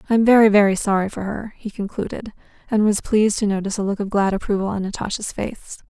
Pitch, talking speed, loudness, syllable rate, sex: 205 Hz, 225 wpm, -20 LUFS, 6.5 syllables/s, female